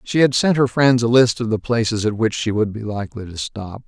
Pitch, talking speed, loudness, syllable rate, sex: 115 Hz, 280 wpm, -18 LUFS, 5.6 syllables/s, male